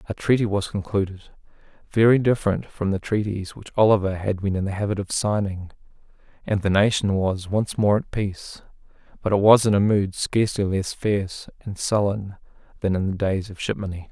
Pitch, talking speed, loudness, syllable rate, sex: 100 Hz, 180 wpm, -22 LUFS, 5.4 syllables/s, male